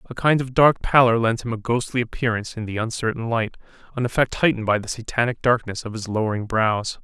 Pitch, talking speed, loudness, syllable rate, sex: 115 Hz, 215 wpm, -21 LUFS, 6.2 syllables/s, male